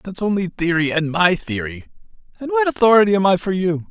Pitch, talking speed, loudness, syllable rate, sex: 170 Hz, 200 wpm, -18 LUFS, 6.1 syllables/s, male